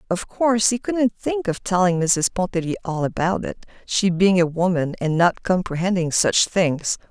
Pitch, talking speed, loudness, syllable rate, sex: 185 Hz, 175 wpm, -20 LUFS, 4.6 syllables/s, female